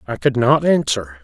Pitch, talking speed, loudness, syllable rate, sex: 140 Hz, 195 wpm, -17 LUFS, 4.8 syllables/s, male